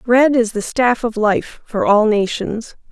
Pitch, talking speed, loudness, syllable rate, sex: 225 Hz, 185 wpm, -16 LUFS, 3.7 syllables/s, female